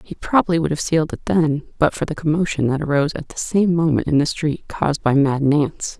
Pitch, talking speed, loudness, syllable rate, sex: 155 Hz, 240 wpm, -19 LUFS, 6.0 syllables/s, female